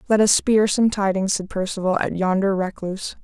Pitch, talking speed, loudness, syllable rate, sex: 195 Hz, 185 wpm, -20 LUFS, 6.0 syllables/s, female